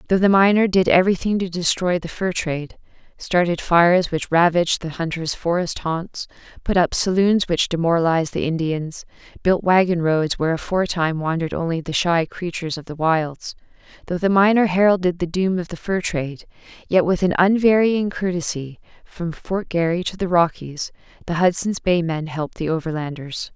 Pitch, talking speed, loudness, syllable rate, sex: 175 Hz, 160 wpm, -20 LUFS, 5.3 syllables/s, female